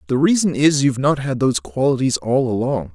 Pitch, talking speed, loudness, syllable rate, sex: 130 Hz, 205 wpm, -18 LUFS, 5.8 syllables/s, male